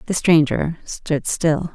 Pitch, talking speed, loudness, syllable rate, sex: 160 Hz, 135 wpm, -19 LUFS, 3.3 syllables/s, female